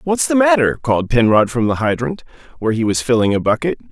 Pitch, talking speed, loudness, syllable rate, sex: 130 Hz, 215 wpm, -16 LUFS, 6.3 syllables/s, male